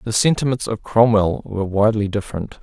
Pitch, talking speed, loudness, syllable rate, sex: 110 Hz, 160 wpm, -19 LUFS, 6.1 syllables/s, male